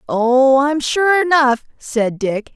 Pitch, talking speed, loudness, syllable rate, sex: 270 Hz, 140 wpm, -15 LUFS, 3.1 syllables/s, female